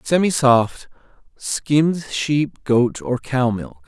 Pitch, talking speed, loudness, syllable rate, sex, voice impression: 130 Hz, 110 wpm, -19 LUFS, 3.1 syllables/s, male, masculine, middle-aged, powerful, slightly hard, halting, cool, calm, slightly mature, wild, lively, kind, slightly strict